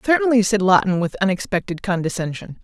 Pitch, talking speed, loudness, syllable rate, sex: 200 Hz, 135 wpm, -19 LUFS, 6.1 syllables/s, female